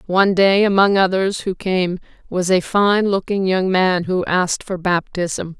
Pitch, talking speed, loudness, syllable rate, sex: 190 Hz, 170 wpm, -17 LUFS, 4.3 syllables/s, female